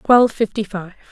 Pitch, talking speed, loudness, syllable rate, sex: 210 Hz, 160 wpm, -18 LUFS, 5.8 syllables/s, female